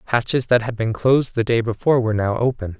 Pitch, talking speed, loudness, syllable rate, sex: 115 Hz, 235 wpm, -19 LUFS, 6.5 syllables/s, male